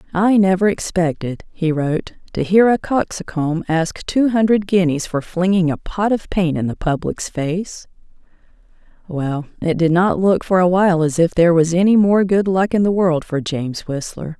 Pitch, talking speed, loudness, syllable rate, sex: 180 Hz, 190 wpm, -17 LUFS, 4.7 syllables/s, female